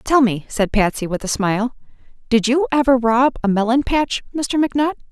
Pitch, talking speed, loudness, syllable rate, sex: 245 Hz, 190 wpm, -18 LUFS, 5.3 syllables/s, female